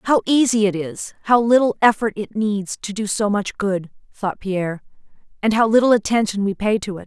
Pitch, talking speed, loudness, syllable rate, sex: 210 Hz, 205 wpm, -19 LUFS, 5.2 syllables/s, female